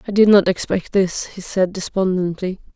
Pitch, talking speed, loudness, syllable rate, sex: 185 Hz, 175 wpm, -18 LUFS, 4.9 syllables/s, female